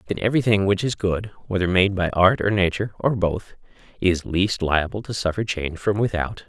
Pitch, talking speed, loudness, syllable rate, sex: 95 Hz, 195 wpm, -22 LUFS, 5.6 syllables/s, male